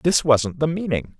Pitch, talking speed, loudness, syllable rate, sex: 145 Hz, 200 wpm, -20 LUFS, 4.4 syllables/s, male